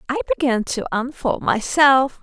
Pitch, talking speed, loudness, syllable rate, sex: 270 Hz, 135 wpm, -19 LUFS, 4.4 syllables/s, female